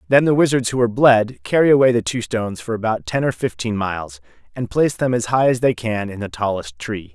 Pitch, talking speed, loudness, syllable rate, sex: 115 Hz, 245 wpm, -18 LUFS, 5.9 syllables/s, male